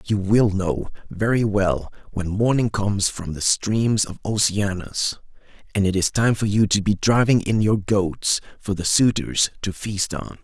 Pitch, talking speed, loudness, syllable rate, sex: 100 Hz, 180 wpm, -21 LUFS, 4.2 syllables/s, male